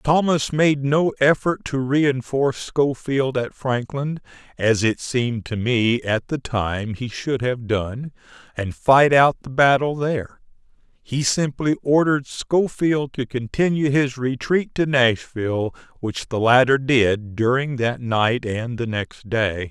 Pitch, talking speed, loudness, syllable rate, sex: 130 Hz, 145 wpm, -20 LUFS, 3.8 syllables/s, male